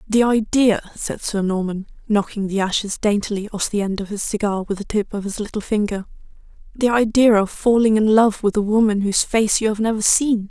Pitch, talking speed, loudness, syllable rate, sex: 210 Hz, 205 wpm, -19 LUFS, 5.5 syllables/s, female